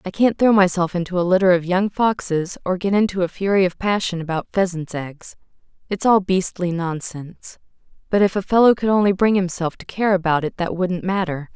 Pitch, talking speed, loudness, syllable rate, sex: 185 Hz, 205 wpm, -19 LUFS, 5.4 syllables/s, female